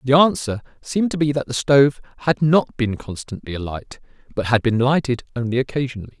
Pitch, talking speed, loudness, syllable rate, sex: 125 Hz, 185 wpm, -20 LUFS, 6.0 syllables/s, male